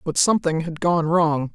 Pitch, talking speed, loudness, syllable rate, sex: 165 Hz, 195 wpm, -20 LUFS, 4.8 syllables/s, female